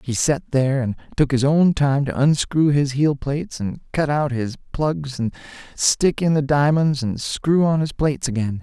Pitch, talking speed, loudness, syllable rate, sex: 140 Hz, 195 wpm, -20 LUFS, 4.6 syllables/s, male